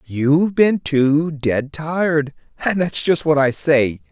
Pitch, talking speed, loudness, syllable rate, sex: 150 Hz, 160 wpm, -17 LUFS, 3.6 syllables/s, male